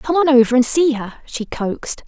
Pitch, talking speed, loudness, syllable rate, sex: 260 Hz, 230 wpm, -16 LUFS, 5.8 syllables/s, female